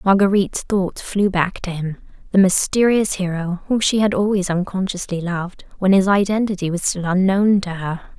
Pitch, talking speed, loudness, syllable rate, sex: 190 Hz, 170 wpm, -19 LUFS, 5.1 syllables/s, female